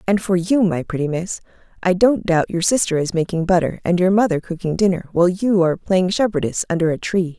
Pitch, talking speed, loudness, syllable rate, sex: 180 Hz, 220 wpm, -18 LUFS, 5.8 syllables/s, female